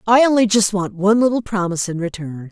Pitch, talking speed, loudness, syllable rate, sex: 200 Hz, 215 wpm, -17 LUFS, 6.3 syllables/s, female